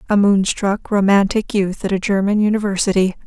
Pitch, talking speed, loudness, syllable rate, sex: 200 Hz, 145 wpm, -17 LUFS, 5.3 syllables/s, female